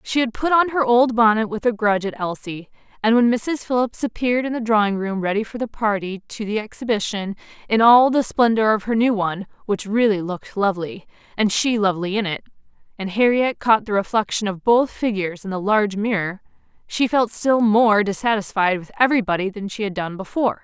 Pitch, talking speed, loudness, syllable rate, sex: 215 Hz, 200 wpm, -20 LUFS, 5.8 syllables/s, female